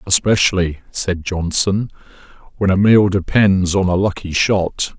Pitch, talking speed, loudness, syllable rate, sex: 95 Hz, 130 wpm, -16 LUFS, 4.2 syllables/s, male